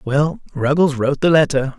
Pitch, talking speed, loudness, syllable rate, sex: 145 Hz, 170 wpm, -17 LUFS, 5.1 syllables/s, male